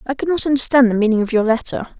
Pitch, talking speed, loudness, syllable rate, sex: 245 Hz, 270 wpm, -16 LUFS, 7.2 syllables/s, female